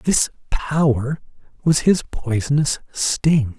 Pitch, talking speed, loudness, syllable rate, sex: 140 Hz, 100 wpm, -20 LUFS, 3.2 syllables/s, male